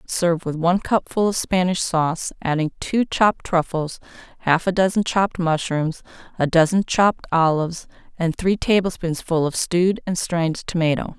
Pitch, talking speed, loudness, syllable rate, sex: 175 Hz, 150 wpm, -21 LUFS, 5.1 syllables/s, female